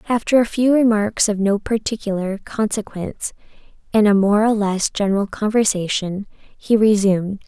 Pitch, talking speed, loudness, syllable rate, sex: 210 Hz, 135 wpm, -18 LUFS, 4.8 syllables/s, female